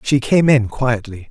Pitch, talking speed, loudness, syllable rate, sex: 125 Hz, 185 wpm, -16 LUFS, 4.2 syllables/s, male